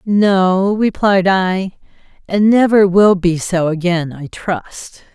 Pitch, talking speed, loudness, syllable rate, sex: 190 Hz, 130 wpm, -14 LUFS, 3.2 syllables/s, female